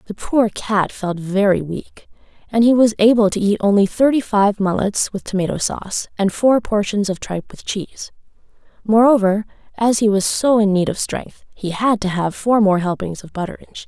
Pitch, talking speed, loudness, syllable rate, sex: 205 Hz, 200 wpm, -17 LUFS, 5.2 syllables/s, female